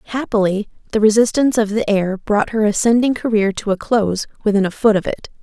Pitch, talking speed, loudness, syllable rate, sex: 210 Hz, 200 wpm, -17 LUFS, 5.9 syllables/s, female